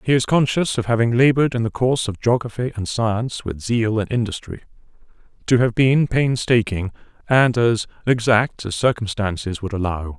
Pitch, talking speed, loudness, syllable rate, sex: 115 Hz, 165 wpm, -19 LUFS, 5.2 syllables/s, male